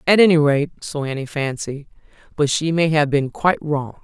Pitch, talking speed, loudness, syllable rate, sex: 150 Hz, 195 wpm, -19 LUFS, 5.2 syllables/s, female